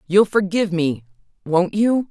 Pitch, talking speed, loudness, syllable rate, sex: 185 Hz, 115 wpm, -19 LUFS, 4.6 syllables/s, female